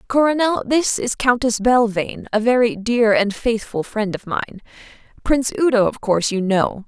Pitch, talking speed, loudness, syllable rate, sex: 230 Hz, 165 wpm, -18 LUFS, 5.1 syllables/s, female